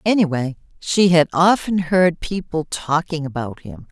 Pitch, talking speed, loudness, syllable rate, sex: 165 Hz, 140 wpm, -19 LUFS, 4.3 syllables/s, female